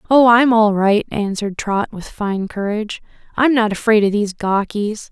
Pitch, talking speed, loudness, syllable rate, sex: 215 Hz, 175 wpm, -17 LUFS, 4.9 syllables/s, female